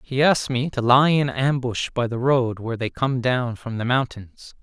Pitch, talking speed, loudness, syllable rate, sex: 125 Hz, 220 wpm, -21 LUFS, 4.7 syllables/s, male